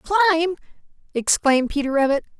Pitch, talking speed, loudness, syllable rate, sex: 310 Hz, 100 wpm, -20 LUFS, 7.6 syllables/s, female